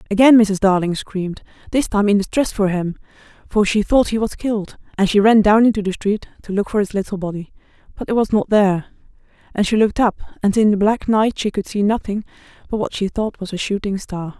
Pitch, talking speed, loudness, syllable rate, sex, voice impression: 205 Hz, 230 wpm, -18 LUFS, 6.0 syllables/s, female, feminine, slightly young, slightly powerful, slightly muffled, slightly unique, slightly light